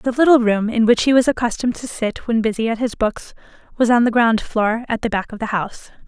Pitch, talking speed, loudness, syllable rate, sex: 230 Hz, 255 wpm, -18 LUFS, 5.9 syllables/s, female